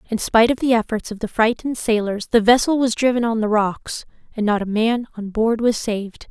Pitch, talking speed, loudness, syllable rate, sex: 225 Hz, 230 wpm, -19 LUFS, 5.6 syllables/s, female